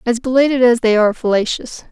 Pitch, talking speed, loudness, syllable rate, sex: 235 Hz, 190 wpm, -15 LUFS, 6.3 syllables/s, female